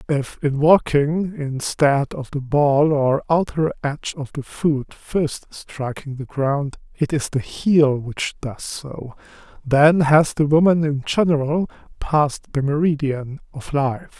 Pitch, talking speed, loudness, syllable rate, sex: 145 Hz, 150 wpm, -20 LUFS, 3.7 syllables/s, male